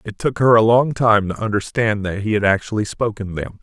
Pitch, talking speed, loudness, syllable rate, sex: 110 Hz, 230 wpm, -18 LUFS, 5.4 syllables/s, male